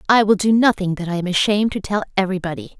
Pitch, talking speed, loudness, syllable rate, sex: 195 Hz, 235 wpm, -18 LUFS, 7.3 syllables/s, female